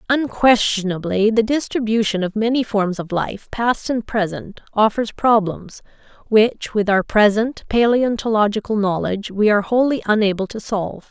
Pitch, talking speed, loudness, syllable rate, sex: 215 Hz, 135 wpm, -18 LUFS, 4.8 syllables/s, female